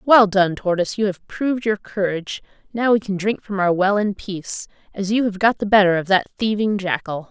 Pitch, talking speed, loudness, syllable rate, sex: 200 Hz, 220 wpm, -20 LUFS, 5.5 syllables/s, female